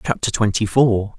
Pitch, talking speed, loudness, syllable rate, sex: 110 Hz, 150 wpm, -18 LUFS, 4.9 syllables/s, male